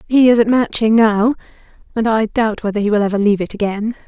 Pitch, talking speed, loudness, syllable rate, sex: 220 Hz, 220 wpm, -15 LUFS, 6.3 syllables/s, female